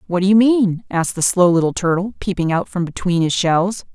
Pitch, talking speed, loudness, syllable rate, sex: 185 Hz, 230 wpm, -17 LUFS, 5.5 syllables/s, female